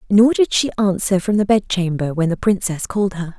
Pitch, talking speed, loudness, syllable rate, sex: 195 Hz, 215 wpm, -18 LUFS, 5.5 syllables/s, female